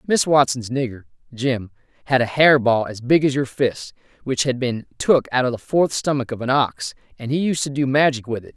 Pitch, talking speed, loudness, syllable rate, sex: 130 Hz, 230 wpm, -20 LUFS, 5.2 syllables/s, male